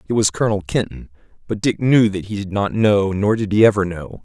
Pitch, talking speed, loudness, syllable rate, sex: 105 Hz, 240 wpm, -18 LUFS, 5.8 syllables/s, male